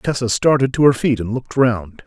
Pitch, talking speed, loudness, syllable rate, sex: 120 Hz, 235 wpm, -17 LUFS, 5.4 syllables/s, male